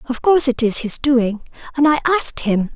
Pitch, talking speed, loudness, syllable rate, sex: 260 Hz, 195 wpm, -16 LUFS, 5.9 syllables/s, female